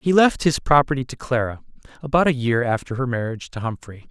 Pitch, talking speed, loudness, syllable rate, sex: 130 Hz, 205 wpm, -21 LUFS, 6.0 syllables/s, male